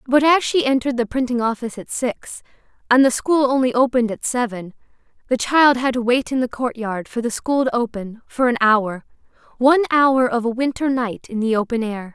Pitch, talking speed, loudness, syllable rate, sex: 245 Hz, 205 wpm, -19 LUFS, 5.5 syllables/s, female